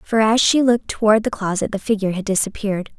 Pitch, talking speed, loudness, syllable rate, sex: 210 Hz, 220 wpm, -18 LUFS, 6.6 syllables/s, female